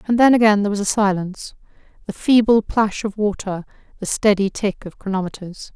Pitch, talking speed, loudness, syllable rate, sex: 205 Hz, 175 wpm, -18 LUFS, 5.7 syllables/s, female